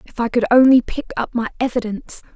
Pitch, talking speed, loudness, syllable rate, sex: 240 Hz, 205 wpm, -17 LUFS, 6.5 syllables/s, female